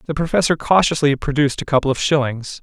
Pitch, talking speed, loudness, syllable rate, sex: 145 Hz, 185 wpm, -18 LUFS, 6.5 syllables/s, male